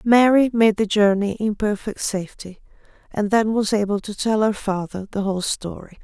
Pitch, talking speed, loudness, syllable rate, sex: 210 Hz, 180 wpm, -20 LUFS, 5.1 syllables/s, female